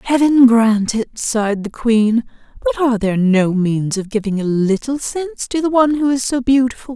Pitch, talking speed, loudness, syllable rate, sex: 235 Hz, 200 wpm, -16 LUFS, 5.2 syllables/s, female